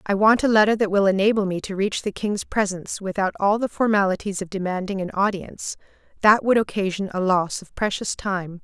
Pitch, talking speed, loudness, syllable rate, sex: 200 Hz, 200 wpm, -22 LUFS, 5.6 syllables/s, female